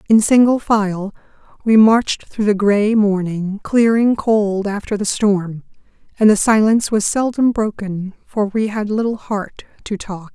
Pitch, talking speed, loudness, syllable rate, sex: 210 Hz, 155 wpm, -16 LUFS, 4.2 syllables/s, female